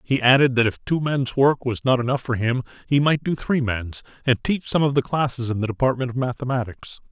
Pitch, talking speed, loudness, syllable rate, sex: 130 Hz, 235 wpm, -21 LUFS, 5.6 syllables/s, male